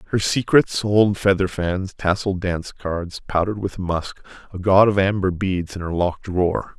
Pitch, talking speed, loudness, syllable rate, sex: 95 Hz, 160 wpm, -20 LUFS, 4.9 syllables/s, male